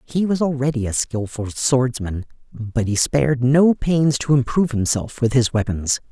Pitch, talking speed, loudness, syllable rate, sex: 125 Hz, 165 wpm, -19 LUFS, 4.6 syllables/s, male